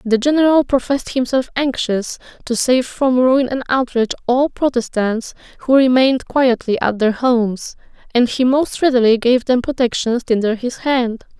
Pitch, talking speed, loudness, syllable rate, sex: 250 Hz, 155 wpm, -16 LUFS, 4.9 syllables/s, female